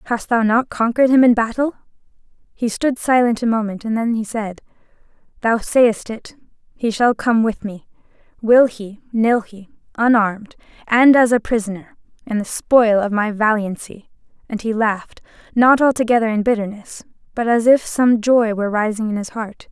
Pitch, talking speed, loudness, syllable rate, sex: 225 Hz, 170 wpm, -17 LUFS, 5.0 syllables/s, female